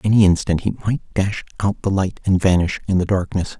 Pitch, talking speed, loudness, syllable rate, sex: 95 Hz, 215 wpm, -19 LUFS, 5.7 syllables/s, male